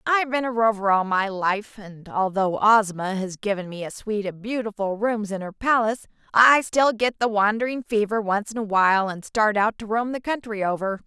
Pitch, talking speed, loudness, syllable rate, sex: 215 Hz, 210 wpm, -22 LUFS, 5.3 syllables/s, female